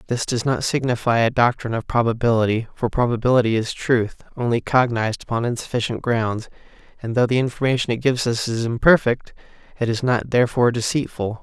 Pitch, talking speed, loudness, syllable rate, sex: 120 Hz, 165 wpm, -20 LUFS, 6.1 syllables/s, male